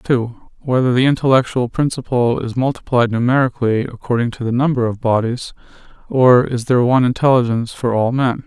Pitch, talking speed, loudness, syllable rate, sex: 125 Hz, 155 wpm, -16 LUFS, 6.1 syllables/s, male